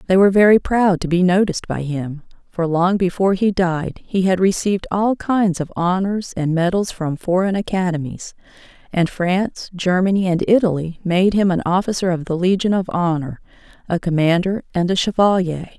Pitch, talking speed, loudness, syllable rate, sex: 180 Hz, 170 wpm, -18 LUFS, 5.2 syllables/s, female